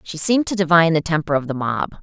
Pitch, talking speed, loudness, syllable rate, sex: 165 Hz, 265 wpm, -18 LUFS, 6.8 syllables/s, female